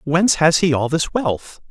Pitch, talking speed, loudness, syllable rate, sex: 160 Hz, 210 wpm, -17 LUFS, 4.6 syllables/s, male